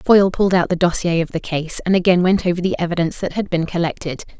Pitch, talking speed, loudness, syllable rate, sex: 175 Hz, 245 wpm, -18 LUFS, 6.9 syllables/s, female